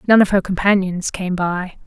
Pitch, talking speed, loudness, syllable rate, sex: 190 Hz, 195 wpm, -18 LUFS, 4.9 syllables/s, female